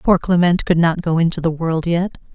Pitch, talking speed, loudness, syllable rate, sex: 170 Hz, 230 wpm, -17 LUFS, 5.1 syllables/s, female